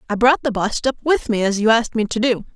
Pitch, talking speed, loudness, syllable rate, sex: 225 Hz, 305 wpm, -18 LUFS, 6.4 syllables/s, female